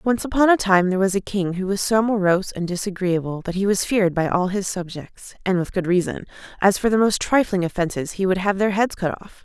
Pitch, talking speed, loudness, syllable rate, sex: 195 Hz, 250 wpm, -21 LUFS, 5.9 syllables/s, female